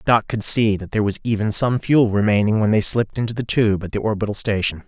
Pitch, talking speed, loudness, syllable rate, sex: 105 Hz, 245 wpm, -19 LUFS, 6.1 syllables/s, male